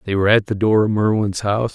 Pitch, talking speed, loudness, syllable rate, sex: 105 Hz, 275 wpm, -17 LUFS, 6.8 syllables/s, male